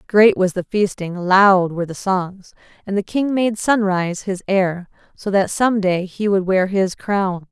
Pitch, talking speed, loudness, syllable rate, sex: 195 Hz, 190 wpm, -18 LUFS, 4.2 syllables/s, female